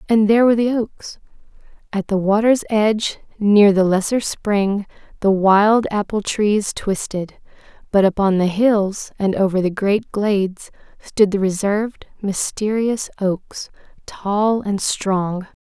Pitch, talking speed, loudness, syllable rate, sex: 205 Hz, 135 wpm, -18 LUFS, 3.9 syllables/s, female